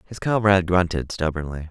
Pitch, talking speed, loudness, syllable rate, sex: 90 Hz, 140 wpm, -21 LUFS, 5.6 syllables/s, male